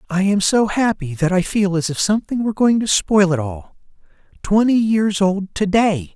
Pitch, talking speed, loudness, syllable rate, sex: 195 Hz, 205 wpm, -17 LUFS, 4.9 syllables/s, male